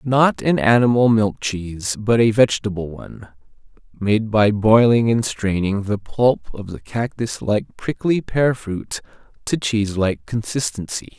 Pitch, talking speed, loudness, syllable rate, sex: 110 Hz, 135 wpm, -19 LUFS, 4.6 syllables/s, male